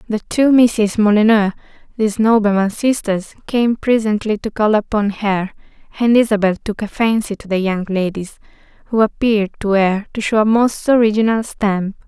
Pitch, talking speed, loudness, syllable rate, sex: 215 Hz, 160 wpm, -16 LUFS, 4.9 syllables/s, female